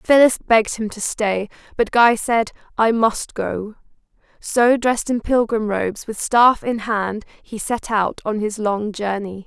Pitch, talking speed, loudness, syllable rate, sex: 220 Hz, 170 wpm, -19 LUFS, 4.1 syllables/s, female